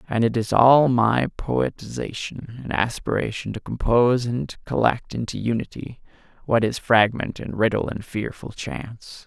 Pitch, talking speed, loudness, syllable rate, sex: 115 Hz, 140 wpm, -22 LUFS, 4.5 syllables/s, male